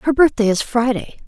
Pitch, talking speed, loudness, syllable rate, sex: 240 Hz, 190 wpm, -17 LUFS, 5.1 syllables/s, female